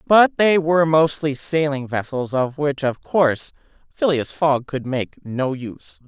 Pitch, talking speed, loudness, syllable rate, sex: 145 Hz, 160 wpm, -20 LUFS, 4.2 syllables/s, female